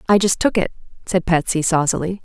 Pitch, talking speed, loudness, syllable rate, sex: 180 Hz, 190 wpm, -18 LUFS, 5.8 syllables/s, female